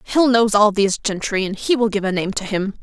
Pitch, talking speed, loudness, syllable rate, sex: 210 Hz, 275 wpm, -18 LUFS, 5.6 syllables/s, female